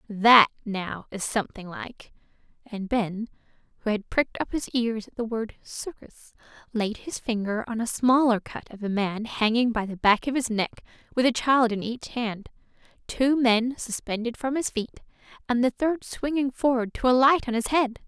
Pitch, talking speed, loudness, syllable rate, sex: 235 Hz, 185 wpm, -25 LUFS, 4.7 syllables/s, female